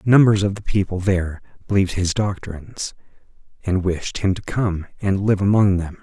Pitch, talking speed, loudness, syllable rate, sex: 95 Hz, 170 wpm, -20 LUFS, 5.1 syllables/s, male